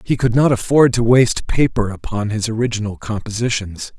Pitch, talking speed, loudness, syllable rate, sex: 115 Hz, 165 wpm, -17 LUFS, 5.4 syllables/s, male